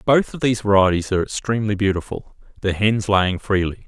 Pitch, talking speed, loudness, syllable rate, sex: 105 Hz, 170 wpm, -19 LUFS, 6.0 syllables/s, male